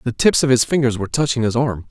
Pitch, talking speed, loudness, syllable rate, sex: 125 Hz, 285 wpm, -17 LUFS, 6.6 syllables/s, male